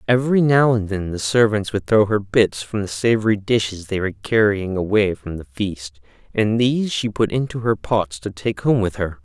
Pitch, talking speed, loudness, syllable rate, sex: 105 Hz, 215 wpm, -19 LUFS, 5.0 syllables/s, male